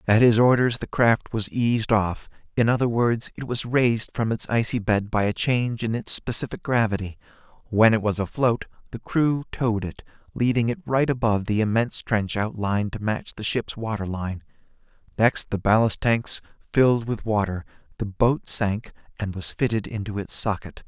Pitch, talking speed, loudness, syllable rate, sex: 110 Hz, 180 wpm, -23 LUFS, 5.2 syllables/s, male